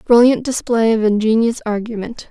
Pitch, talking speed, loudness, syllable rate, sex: 225 Hz, 130 wpm, -16 LUFS, 5.2 syllables/s, female